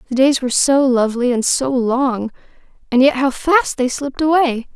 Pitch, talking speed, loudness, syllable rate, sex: 260 Hz, 190 wpm, -16 LUFS, 5.1 syllables/s, female